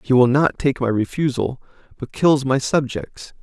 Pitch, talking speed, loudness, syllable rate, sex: 130 Hz, 175 wpm, -19 LUFS, 4.5 syllables/s, male